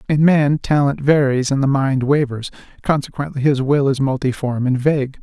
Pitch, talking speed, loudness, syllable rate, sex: 140 Hz, 170 wpm, -17 LUFS, 5.1 syllables/s, male